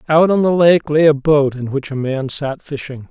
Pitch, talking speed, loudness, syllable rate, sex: 145 Hz, 250 wpm, -15 LUFS, 4.8 syllables/s, male